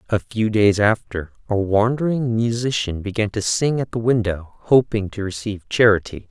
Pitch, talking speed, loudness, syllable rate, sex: 110 Hz, 160 wpm, -20 LUFS, 5.0 syllables/s, male